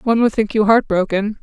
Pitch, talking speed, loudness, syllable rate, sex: 215 Hz, 255 wpm, -16 LUFS, 5.8 syllables/s, female